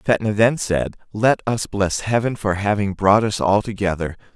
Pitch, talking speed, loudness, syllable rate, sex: 100 Hz, 180 wpm, -20 LUFS, 4.6 syllables/s, male